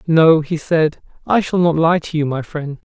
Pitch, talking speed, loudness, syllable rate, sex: 160 Hz, 225 wpm, -16 LUFS, 4.5 syllables/s, male